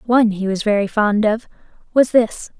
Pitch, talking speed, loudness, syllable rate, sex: 220 Hz, 185 wpm, -17 LUFS, 4.8 syllables/s, female